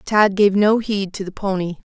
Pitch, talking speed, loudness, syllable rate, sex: 200 Hz, 220 wpm, -18 LUFS, 4.6 syllables/s, female